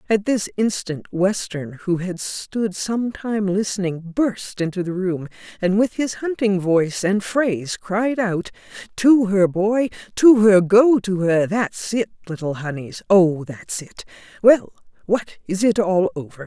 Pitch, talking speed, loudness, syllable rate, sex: 195 Hz, 155 wpm, -20 LUFS, 4.0 syllables/s, female